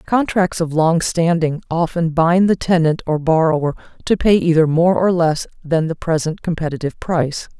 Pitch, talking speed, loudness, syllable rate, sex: 165 Hz, 165 wpm, -17 LUFS, 5.0 syllables/s, female